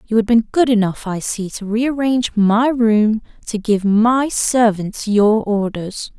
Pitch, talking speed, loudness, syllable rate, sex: 220 Hz, 155 wpm, -17 LUFS, 3.8 syllables/s, female